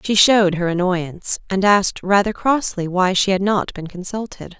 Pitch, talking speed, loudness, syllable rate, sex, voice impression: 195 Hz, 185 wpm, -18 LUFS, 5.0 syllables/s, female, very feminine, slightly young, slightly adult-like, thin, very tensed, powerful, bright, very hard, very clear, fluent, very cool, intellectual, very refreshing, sincere, slightly calm, reassuring, unique, elegant, slightly wild, sweet, very lively, strict, intense, sharp